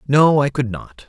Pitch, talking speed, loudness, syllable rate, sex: 130 Hz, 220 wpm, -17 LUFS, 4.4 syllables/s, male